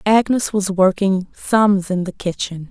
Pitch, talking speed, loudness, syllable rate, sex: 195 Hz, 155 wpm, -18 LUFS, 4.2 syllables/s, female